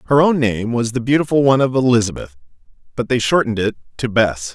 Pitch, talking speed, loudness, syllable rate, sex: 120 Hz, 200 wpm, -17 LUFS, 6.4 syllables/s, male